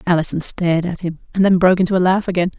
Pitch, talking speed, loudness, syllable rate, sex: 180 Hz, 255 wpm, -17 LUFS, 7.5 syllables/s, female